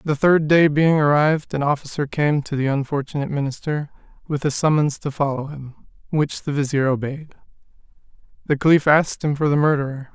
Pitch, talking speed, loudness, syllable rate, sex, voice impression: 145 Hz, 170 wpm, -20 LUFS, 5.7 syllables/s, male, masculine, adult-like, slightly middle-aged, tensed, slightly weak, slightly dark, slightly hard, slightly muffled, fluent, slightly cool, intellectual, slightly refreshing, sincere, calm, slightly mature, slightly sweet, slightly kind, slightly modest